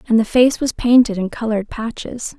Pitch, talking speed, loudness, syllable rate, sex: 230 Hz, 200 wpm, -17 LUFS, 5.4 syllables/s, female